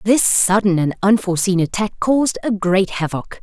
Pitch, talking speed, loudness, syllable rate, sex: 195 Hz, 160 wpm, -17 LUFS, 5.0 syllables/s, female